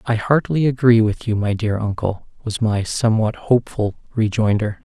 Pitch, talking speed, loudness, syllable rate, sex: 110 Hz, 155 wpm, -19 LUFS, 5.2 syllables/s, male